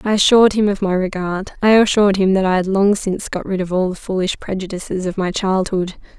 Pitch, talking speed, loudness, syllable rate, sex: 190 Hz, 235 wpm, -17 LUFS, 6.0 syllables/s, female